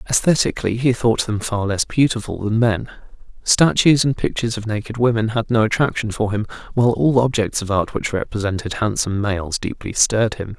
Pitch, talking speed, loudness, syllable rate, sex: 110 Hz, 180 wpm, -19 LUFS, 5.6 syllables/s, male